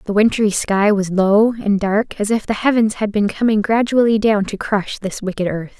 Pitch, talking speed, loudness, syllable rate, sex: 210 Hz, 215 wpm, -17 LUFS, 4.9 syllables/s, female